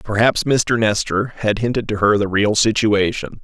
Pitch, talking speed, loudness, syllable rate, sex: 105 Hz, 175 wpm, -17 LUFS, 4.7 syllables/s, male